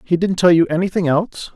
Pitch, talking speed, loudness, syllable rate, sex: 175 Hz, 230 wpm, -16 LUFS, 6.2 syllables/s, male